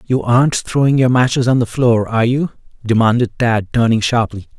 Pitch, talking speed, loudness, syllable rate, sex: 120 Hz, 185 wpm, -15 LUFS, 5.4 syllables/s, male